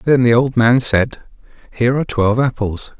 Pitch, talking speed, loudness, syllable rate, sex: 120 Hz, 180 wpm, -15 LUFS, 5.2 syllables/s, male